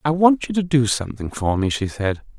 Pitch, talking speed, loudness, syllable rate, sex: 125 Hz, 250 wpm, -20 LUFS, 5.5 syllables/s, male